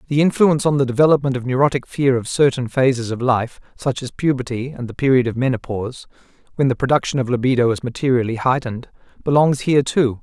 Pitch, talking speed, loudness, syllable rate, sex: 130 Hz, 190 wpm, -18 LUFS, 6.4 syllables/s, male